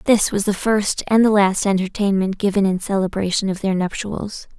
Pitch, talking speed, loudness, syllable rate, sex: 200 Hz, 185 wpm, -19 LUFS, 5.0 syllables/s, female